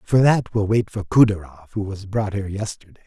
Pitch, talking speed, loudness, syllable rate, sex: 105 Hz, 215 wpm, -21 LUFS, 5.5 syllables/s, male